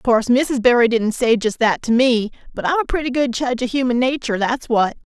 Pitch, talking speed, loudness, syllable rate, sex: 245 Hz, 245 wpm, -18 LUFS, 6.0 syllables/s, female